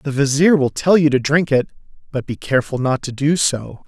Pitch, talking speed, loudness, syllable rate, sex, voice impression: 140 Hz, 230 wpm, -17 LUFS, 5.3 syllables/s, male, masculine, adult-like, slightly cool, slightly friendly, slightly unique